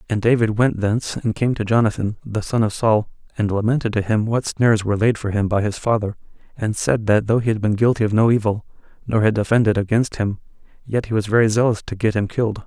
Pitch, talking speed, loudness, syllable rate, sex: 110 Hz, 235 wpm, -19 LUFS, 6.2 syllables/s, male